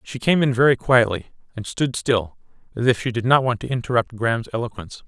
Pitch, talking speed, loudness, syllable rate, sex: 120 Hz, 215 wpm, -20 LUFS, 6.0 syllables/s, male